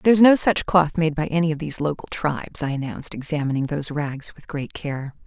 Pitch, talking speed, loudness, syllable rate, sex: 155 Hz, 230 wpm, -22 LUFS, 6.2 syllables/s, female